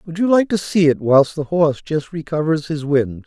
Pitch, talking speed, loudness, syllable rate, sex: 155 Hz, 240 wpm, -17 LUFS, 5.1 syllables/s, male